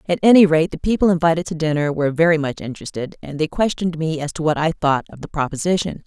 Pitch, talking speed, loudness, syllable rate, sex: 160 Hz, 240 wpm, -19 LUFS, 6.7 syllables/s, female